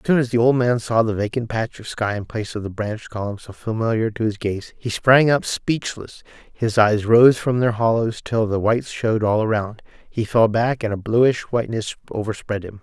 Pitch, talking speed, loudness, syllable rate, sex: 110 Hz, 225 wpm, -20 LUFS, 5.1 syllables/s, male